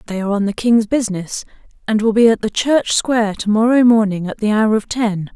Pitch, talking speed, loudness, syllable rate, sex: 215 Hz, 235 wpm, -16 LUFS, 5.7 syllables/s, female